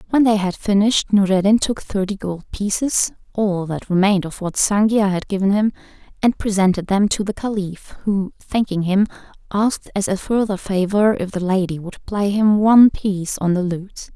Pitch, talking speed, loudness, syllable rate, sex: 200 Hz, 180 wpm, -18 LUFS, 4.4 syllables/s, female